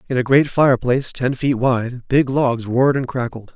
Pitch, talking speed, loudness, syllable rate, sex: 130 Hz, 205 wpm, -18 LUFS, 5.0 syllables/s, male